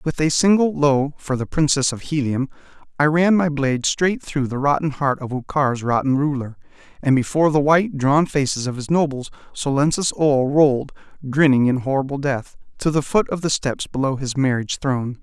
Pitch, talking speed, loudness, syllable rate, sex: 140 Hz, 190 wpm, -19 LUFS, 5.4 syllables/s, male